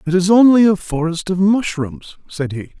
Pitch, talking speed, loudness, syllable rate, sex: 180 Hz, 195 wpm, -15 LUFS, 4.8 syllables/s, male